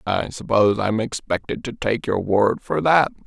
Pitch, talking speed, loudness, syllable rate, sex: 110 Hz, 185 wpm, -21 LUFS, 4.7 syllables/s, male